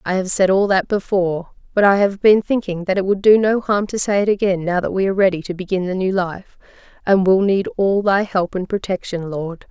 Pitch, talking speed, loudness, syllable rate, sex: 190 Hz, 245 wpm, -18 LUFS, 5.5 syllables/s, female